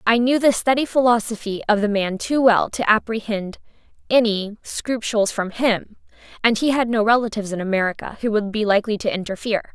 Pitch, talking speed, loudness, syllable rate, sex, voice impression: 220 Hz, 180 wpm, -20 LUFS, 5.7 syllables/s, female, feminine, slightly young, tensed, powerful, slightly halting, intellectual, slightly friendly, elegant, lively, slightly sharp